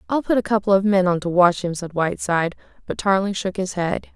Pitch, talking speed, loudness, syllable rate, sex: 190 Hz, 245 wpm, -20 LUFS, 6.1 syllables/s, female